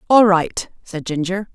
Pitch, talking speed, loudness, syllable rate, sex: 190 Hz, 155 wpm, -18 LUFS, 4.1 syllables/s, female